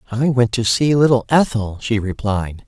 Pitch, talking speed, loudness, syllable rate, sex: 120 Hz, 180 wpm, -17 LUFS, 4.7 syllables/s, male